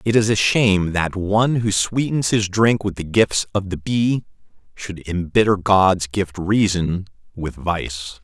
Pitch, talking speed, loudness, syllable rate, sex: 100 Hz, 170 wpm, -19 LUFS, 4.0 syllables/s, male